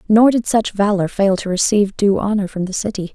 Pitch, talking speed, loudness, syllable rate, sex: 205 Hz, 230 wpm, -17 LUFS, 5.7 syllables/s, female